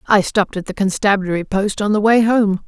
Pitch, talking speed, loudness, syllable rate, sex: 200 Hz, 225 wpm, -16 LUFS, 5.9 syllables/s, female